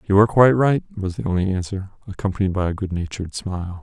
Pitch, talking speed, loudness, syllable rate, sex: 100 Hz, 205 wpm, -21 LUFS, 7.1 syllables/s, male